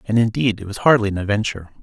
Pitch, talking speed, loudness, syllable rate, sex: 105 Hz, 230 wpm, -19 LUFS, 7.3 syllables/s, male